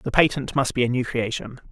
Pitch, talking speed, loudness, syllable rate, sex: 130 Hz, 245 wpm, -23 LUFS, 5.7 syllables/s, male